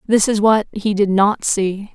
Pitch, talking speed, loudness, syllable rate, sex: 205 Hz, 215 wpm, -16 LUFS, 3.9 syllables/s, female